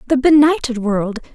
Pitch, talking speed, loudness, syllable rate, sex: 255 Hz, 135 wpm, -15 LUFS, 4.9 syllables/s, female